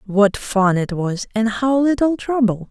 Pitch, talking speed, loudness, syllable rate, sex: 225 Hz, 180 wpm, -18 LUFS, 4.0 syllables/s, female